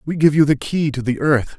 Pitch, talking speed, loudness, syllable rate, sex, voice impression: 145 Hz, 305 wpm, -17 LUFS, 5.4 syllables/s, male, masculine, middle-aged, weak, slightly muffled, slightly fluent, raspy, calm, slightly mature, wild, strict, modest